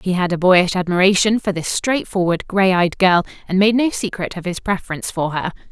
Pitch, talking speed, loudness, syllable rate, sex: 185 Hz, 210 wpm, -17 LUFS, 5.6 syllables/s, female